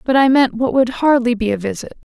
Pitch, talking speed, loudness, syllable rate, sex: 245 Hz, 255 wpm, -16 LUFS, 5.8 syllables/s, female